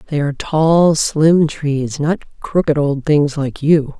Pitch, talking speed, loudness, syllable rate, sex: 150 Hz, 165 wpm, -15 LUFS, 3.6 syllables/s, female